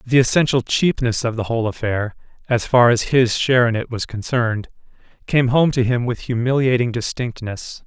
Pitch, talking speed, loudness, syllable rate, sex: 120 Hz, 160 wpm, -19 LUFS, 5.3 syllables/s, male